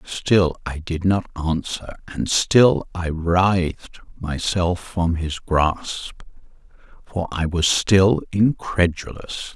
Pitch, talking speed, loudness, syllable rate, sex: 90 Hz, 115 wpm, -20 LUFS, 3.0 syllables/s, male